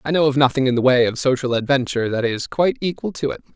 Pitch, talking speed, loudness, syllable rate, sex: 135 Hz, 270 wpm, -19 LUFS, 7.0 syllables/s, male